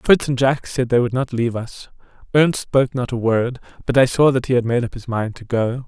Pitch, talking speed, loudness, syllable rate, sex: 125 Hz, 265 wpm, -19 LUFS, 5.7 syllables/s, male